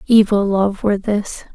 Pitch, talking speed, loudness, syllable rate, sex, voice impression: 205 Hz, 155 wpm, -17 LUFS, 4.6 syllables/s, female, feminine, slightly adult-like, slightly weak, slightly dark, calm, reassuring